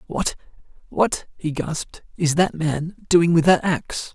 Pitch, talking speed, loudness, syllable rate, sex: 160 Hz, 145 wpm, -21 LUFS, 4.1 syllables/s, male